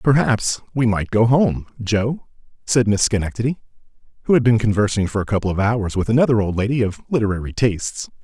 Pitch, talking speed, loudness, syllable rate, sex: 110 Hz, 180 wpm, -19 LUFS, 5.9 syllables/s, male